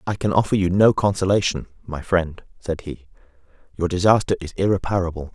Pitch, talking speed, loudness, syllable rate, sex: 90 Hz, 155 wpm, -21 LUFS, 5.8 syllables/s, male